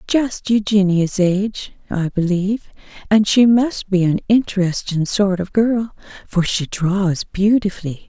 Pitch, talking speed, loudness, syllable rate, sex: 195 Hz, 135 wpm, -18 LUFS, 4.2 syllables/s, female